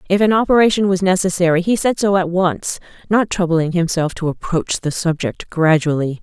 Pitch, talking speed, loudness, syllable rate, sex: 180 Hz, 175 wpm, -17 LUFS, 5.2 syllables/s, female